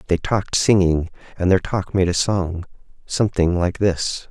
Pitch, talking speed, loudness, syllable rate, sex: 90 Hz, 165 wpm, -20 LUFS, 4.7 syllables/s, male